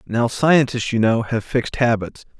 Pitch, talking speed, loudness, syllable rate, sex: 120 Hz, 175 wpm, -19 LUFS, 4.6 syllables/s, male